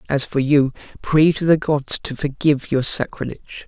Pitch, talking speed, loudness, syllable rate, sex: 145 Hz, 180 wpm, -18 LUFS, 5.0 syllables/s, male